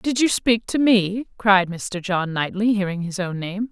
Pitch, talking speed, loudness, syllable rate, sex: 200 Hz, 210 wpm, -21 LUFS, 4.2 syllables/s, female